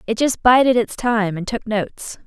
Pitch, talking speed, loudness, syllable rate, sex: 225 Hz, 210 wpm, -18 LUFS, 4.8 syllables/s, female